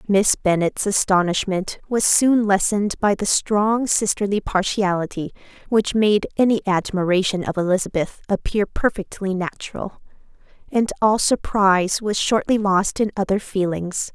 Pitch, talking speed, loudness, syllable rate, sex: 200 Hz, 125 wpm, -20 LUFS, 4.6 syllables/s, female